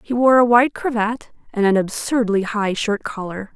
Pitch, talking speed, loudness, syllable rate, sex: 220 Hz, 185 wpm, -18 LUFS, 4.9 syllables/s, female